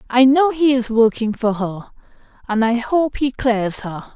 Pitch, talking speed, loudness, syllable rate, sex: 240 Hz, 190 wpm, -17 LUFS, 4.4 syllables/s, female